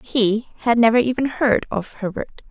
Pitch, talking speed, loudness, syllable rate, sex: 230 Hz, 170 wpm, -19 LUFS, 5.0 syllables/s, female